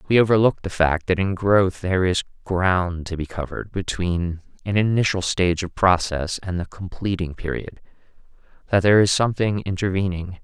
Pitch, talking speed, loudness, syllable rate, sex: 95 Hz, 160 wpm, -21 LUFS, 5.3 syllables/s, male